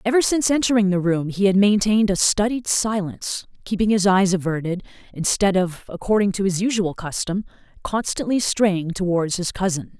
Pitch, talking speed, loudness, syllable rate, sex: 195 Hz, 160 wpm, -20 LUFS, 5.4 syllables/s, female